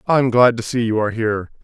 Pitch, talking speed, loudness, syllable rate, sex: 115 Hz, 255 wpm, -17 LUFS, 6.5 syllables/s, male